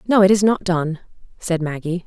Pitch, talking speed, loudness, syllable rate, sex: 180 Hz, 205 wpm, -19 LUFS, 5.2 syllables/s, female